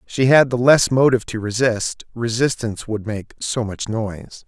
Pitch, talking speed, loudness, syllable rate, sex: 115 Hz, 175 wpm, -19 LUFS, 4.8 syllables/s, male